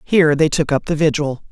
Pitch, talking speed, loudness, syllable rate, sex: 155 Hz, 240 wpm, -16 LUFS, 5.8 syllables/s, male